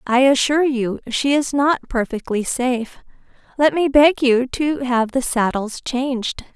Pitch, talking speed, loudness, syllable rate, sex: 255 Hz, 155 wpm, -18 LUFS, 4.3 syllables/s, female